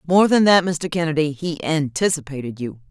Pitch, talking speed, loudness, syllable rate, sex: 160 Hz, 165 wpm, -19 LUFS, 5.3 syllables/s, female